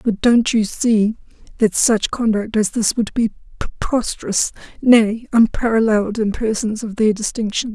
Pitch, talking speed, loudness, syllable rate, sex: 220 Hz, 145 wpm, -17 LUFS, 4.5 syllables/s, female